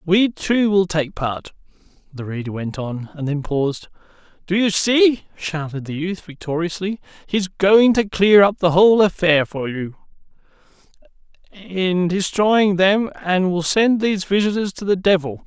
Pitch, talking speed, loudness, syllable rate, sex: 180 Hz, 155 wpm, -18 LUFS, 3.0 syllables/s, male